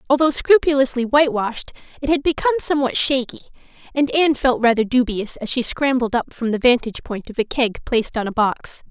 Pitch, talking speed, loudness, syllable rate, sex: 255 Hz, 190 wpm, -19 LUFS, 6.1 syllables/s, female